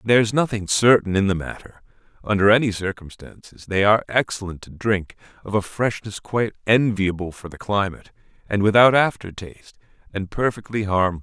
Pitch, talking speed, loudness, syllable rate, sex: 105 Hz, 160 wpm, -20 LUFS, 5.7 syllables/s, male